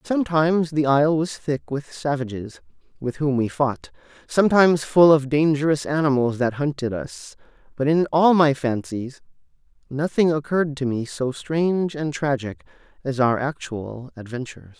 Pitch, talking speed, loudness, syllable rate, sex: 145 Hz, 145 wpm, -21 LUFS, 4.8 syllables/s, male